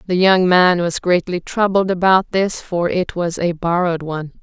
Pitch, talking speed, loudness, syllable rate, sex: 180 Hz, 190 wpm, -17 LUFS, 4.7 syllables/s, female